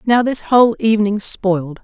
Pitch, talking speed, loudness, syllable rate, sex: 210 Hz, 165 wpm, -15 LUFS, 5.4 syllables/s, female